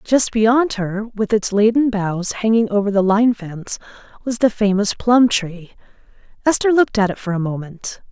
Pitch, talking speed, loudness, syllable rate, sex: 215 Hz, 180 wpm, -17 LUFS, 4.7 syllables/s, female